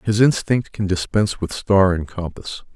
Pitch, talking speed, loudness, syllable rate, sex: 100 Hz, 175 wpm, -19 LUFS, 4.7 syllables/s, male